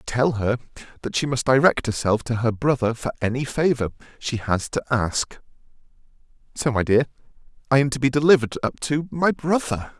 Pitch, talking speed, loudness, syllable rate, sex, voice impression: 130 Hz, 170 wpm, -22 LUFS, 5.4 syllables/s, male, masculine, adult-like, slightly thin, relaxed, weak, slightly soft, fluent, slightly raspy, cool, calm, slightly mature, unique, wild, slightly lively, kind